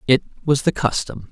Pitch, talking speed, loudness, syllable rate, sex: 140 Hz, 185 wpm, -20 LUFS, 5.4 syllables/s, male